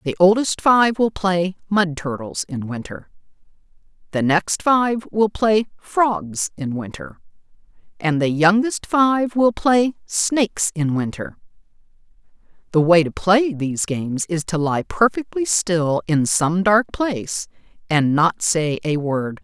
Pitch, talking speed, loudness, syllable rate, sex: 180 Hz, 140 wpm, -19 LUFS, 3.8 syllables/s, female